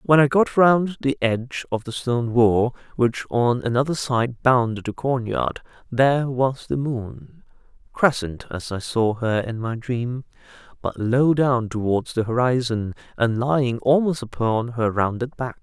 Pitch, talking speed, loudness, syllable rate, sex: 125 Hz, 160 wpm, -22 LUFS, 4.2 syllables/s, male